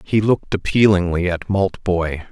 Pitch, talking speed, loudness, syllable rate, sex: 95 Hz, 130 wpm, -18 LUFS, 4.6 syllables/s, male